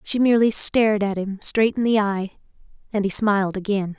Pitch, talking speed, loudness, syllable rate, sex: 205 Hz, 180 wpm, -20 LUFS, 5.1 syllables/s, female